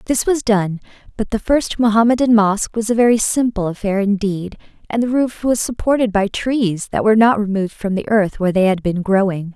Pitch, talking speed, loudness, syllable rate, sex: 215 Hz, 205 wpm, -17 LUFS, 5.5 syllables/s, female